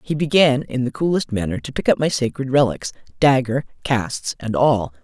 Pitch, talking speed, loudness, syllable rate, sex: 125 Hz, 190 wpm, -19 LUFS, 5.1 syllables/s, female